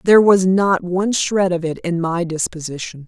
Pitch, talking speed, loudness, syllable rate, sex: 180 Hz, 195 wpm, -17 LUFS, 5.1 syllables/s, female